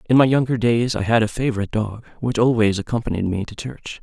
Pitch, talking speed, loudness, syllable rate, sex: 115 Hz, 225 wpm, -20 LUFS, 6.3 syllables/s, male